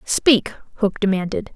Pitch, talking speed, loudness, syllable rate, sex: 205 Hz, 115 wpm, -19 LUFS, 4.4 syllables/s, female